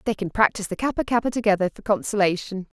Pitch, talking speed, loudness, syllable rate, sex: 200 Hz, 195 wpm, -23 LUFS, 7.1 syllables/s, female